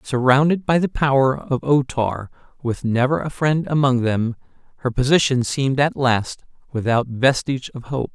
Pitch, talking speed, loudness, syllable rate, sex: 130 Hz, 160 wpm, -20 LUFS, 4.7 syllables/s, male